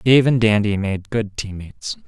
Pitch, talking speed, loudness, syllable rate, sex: 105 Hz, 200 wpm, -19 LUFS, 4.7 syllables/s, male